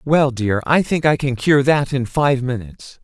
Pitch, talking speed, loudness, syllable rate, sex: 135 Hz, 220 wpm, -17 LUFS, 4.5 syllables/s, male